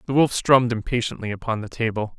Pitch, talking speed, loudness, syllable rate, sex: 115 Hz, 190 wpm, -22 LUFS, 6.4 syllables/s, male